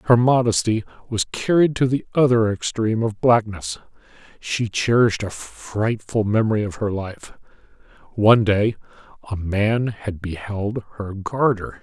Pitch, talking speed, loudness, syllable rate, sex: 110 Hz, 130 wpm, -21 LUFS, 4.4 syllables/s, male